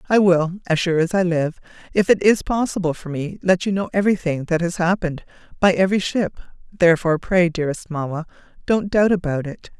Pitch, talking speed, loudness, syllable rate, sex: 175 Hz, 190 wpm, -20 LUFS, 5.9 syllables/s, female